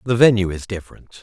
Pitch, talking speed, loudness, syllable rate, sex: 105 Hz, 195 wpm, -17 LUFS, 7.1 syllables/s, male